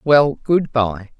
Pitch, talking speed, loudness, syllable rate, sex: 130 Hz, 150 wpm, -17 LUFS, 2.9 syllables/s, female